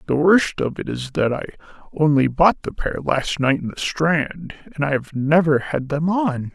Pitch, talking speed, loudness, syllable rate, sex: 155 Hz, 210 wpm, -20 LUFS, 4.6 syllables/s, male